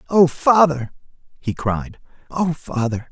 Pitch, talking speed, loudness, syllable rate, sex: 150 Hz, 115 wpm, -19 LUFS, 3.7 syllables/s, male